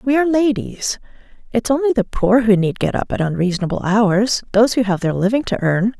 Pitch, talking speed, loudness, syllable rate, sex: 220 Hz, 200 wpm, -17 LUFS, 5.6 syllables/s, female